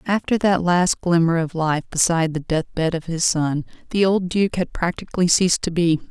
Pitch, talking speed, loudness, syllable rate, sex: 170 Hz, 195 wpm, -20 LUFS, 5.1 syllables/s, female